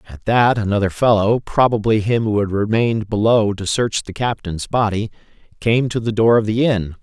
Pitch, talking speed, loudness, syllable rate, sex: 110 Hz, 190 wpm, -17 LUFS, 5.1 syllables/s, male